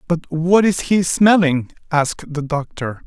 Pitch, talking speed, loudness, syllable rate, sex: 165 Hz, 155 wpm, -17 LUFS, 4.1 syllables/s, male